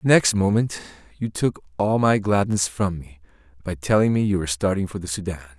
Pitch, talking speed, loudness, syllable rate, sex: 95 Hz, 205 wpm, -22 LUFS, 5.6 syllables/s, male